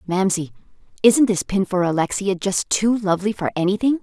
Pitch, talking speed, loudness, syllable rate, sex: 195 Hz, 165 wpm, -20 LUFS, 5.4 syllables/s, female